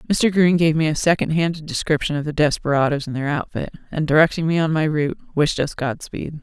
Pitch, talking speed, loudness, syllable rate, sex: 155 Hz, 215 wpm, -20 LUFS, 5.9 syllables/s, female